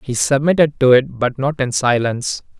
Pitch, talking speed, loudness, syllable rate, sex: 135 Hz, 185 wpm, -16 LUFS, 5.1 syllables/s, male